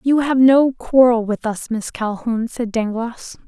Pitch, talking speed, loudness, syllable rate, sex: 235 Hz, 175 wpm, -17 LUFS, 4.0 syllables/s, female